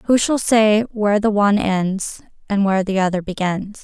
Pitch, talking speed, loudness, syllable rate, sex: 205 Hz, 190 wpm, -18 LUFS, 4.9 syllables/s, female